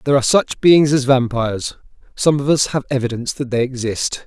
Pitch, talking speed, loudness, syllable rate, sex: 130 Hz, 195 wpm, -17 LUFS, 5.9 syllables/s, male